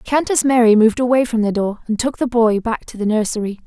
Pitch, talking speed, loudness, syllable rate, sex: 230 Hz, 245 wpm, -17 LUFS, 6.0 syllables/s, female